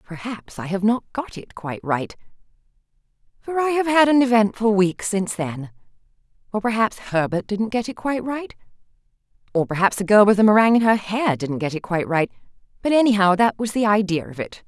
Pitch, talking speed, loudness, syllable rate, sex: 210 Hz, 195 wpm, -20 LUFS, 5.8 syllables/s, female